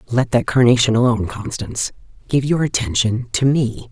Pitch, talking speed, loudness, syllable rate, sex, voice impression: 120 Hz, 155 wpm, -18 LUFS, 5.4 syllables/s, female, feminine, middle-aged, slightly relaxed, powerful, slightly hard, muffled, slightly raspy, intellectual, calm, slightly mature, friendly, reassuring, unique, elegant, lively, slightly strict, slightly sharp